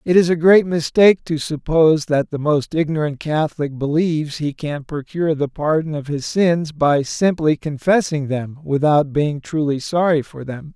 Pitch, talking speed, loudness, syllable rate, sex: 155 Hz, 175 wpm, -18 LUFS, 4.7 syllables/s, male